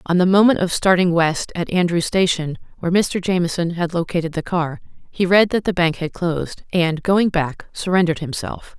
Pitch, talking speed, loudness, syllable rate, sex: 175 Hz, 190 wpm, -19 LUFS, 5.3 syllables/s, female